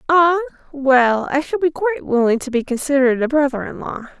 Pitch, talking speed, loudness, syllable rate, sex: 285 Hz, 200 wpm, -18 LUFS, 5.8 syllables/s, female